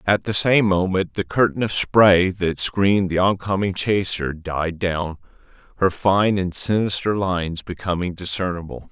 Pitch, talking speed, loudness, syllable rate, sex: 95 Hz, 155 wpm, -20 LUFS, 4.4 syllables/s, male